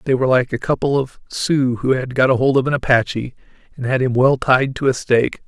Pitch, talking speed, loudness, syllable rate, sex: 130 Hz, 240 wpm, -17 LUFS, 5.6 syllables/s, male